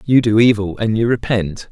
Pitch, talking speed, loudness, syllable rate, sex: 110 Hz, 210 wpm, -16 LUFS, 5.0 syllables/s, male